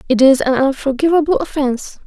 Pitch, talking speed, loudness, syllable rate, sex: 275 Hz, 145 wpm, -15 LUFS, 6.0 syllables/s, female